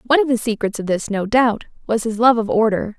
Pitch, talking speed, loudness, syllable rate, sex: 225 Hz, 260 wpm, -18 LUFS, 6.0 syllables/s, female